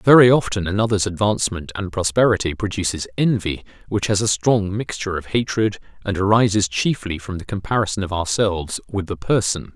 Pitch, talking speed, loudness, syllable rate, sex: 100 Hz, 160 wpm, -20 LUFS, 5.7 syllables/s, male